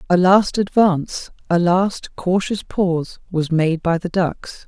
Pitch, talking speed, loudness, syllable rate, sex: 180 Hz, 155 wpm, -18 LUFS, 3.8 syllables/s, female